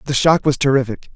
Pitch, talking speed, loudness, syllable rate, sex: 140 Hz, 210 wpm, -16 LUFS, 6.2 syllables/s, male